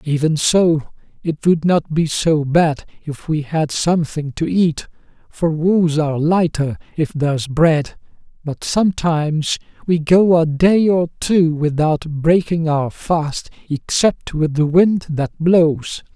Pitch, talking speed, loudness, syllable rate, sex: 160 Hz, 145 wpm, -17 LUFS, 3.7 syllables/s, male